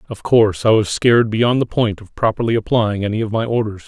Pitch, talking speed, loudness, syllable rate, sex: 110 Hz, 230 wpm, -17 LUFS, 6.0 syllables/s, male